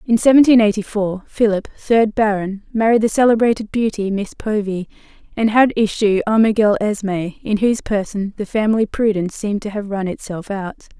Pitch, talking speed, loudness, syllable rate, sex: 210 Hz, 165 wpm, -17 LUFS, 5.4 syllables/s, female